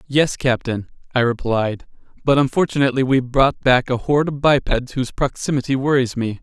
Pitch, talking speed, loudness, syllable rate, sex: 130 Hz, 160 wpm, -19 LUFS, 5.7 syllables/s, male